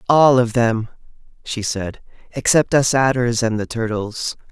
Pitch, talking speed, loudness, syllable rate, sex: 120 Hz, 145 wpm, -18 LUFS, 4.1 syllables/s, male